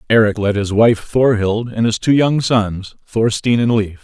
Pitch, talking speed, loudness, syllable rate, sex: 110 Hz, 195 wpm, -15 LUFS, 4.3 syllables/s, male